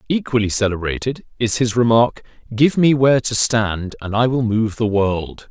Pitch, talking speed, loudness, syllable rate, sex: 115 Hz, 175 wpm, -18 LUFS, 4.8 syllables/s, male